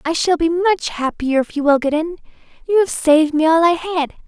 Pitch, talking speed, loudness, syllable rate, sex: 320 Hz, 240 wpm, -16 LUFS, 5.4 syllables/s, female